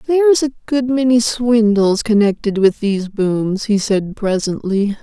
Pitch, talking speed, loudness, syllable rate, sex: 220 Hz, 145 wpm, -16 LUFS, 4.3 syllables/s, female